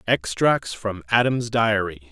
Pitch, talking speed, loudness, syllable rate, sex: 105 Hz, 115 wpm, -22 LUFS, 3.7 syllables/s, male